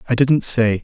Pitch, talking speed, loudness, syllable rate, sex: 120 Hz, 215 wpm, -17 LUFS, 4.8 syllables/s, male